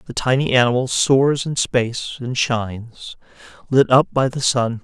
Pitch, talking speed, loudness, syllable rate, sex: 125 Hz, 160 wpm, -18 LUFS, 4.4 syllables/s, male